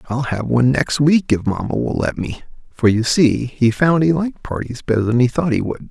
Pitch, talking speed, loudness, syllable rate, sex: 130 Hz, 245 wpm, -17 LUFS, 5.3 syllables/s, male